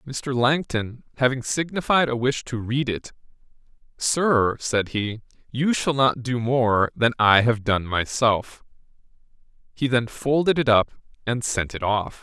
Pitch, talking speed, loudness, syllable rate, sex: 125 Hz, 150 wpm, -22 LUFS, 4.1 syllables/s, male